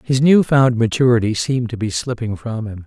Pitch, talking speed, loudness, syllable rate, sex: 120 Hz, 210 wpm, -17 LUFS, 5.4 syllables/s, male